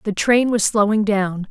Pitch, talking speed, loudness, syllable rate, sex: 210 Hz, 200 wpm, -17 LUFS, 4.4 syllables/s, female